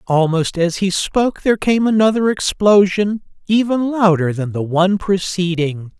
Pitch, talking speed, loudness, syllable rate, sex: 190 Hz, 140 wpm, -16 LUFS, 4.7 syllables/s, male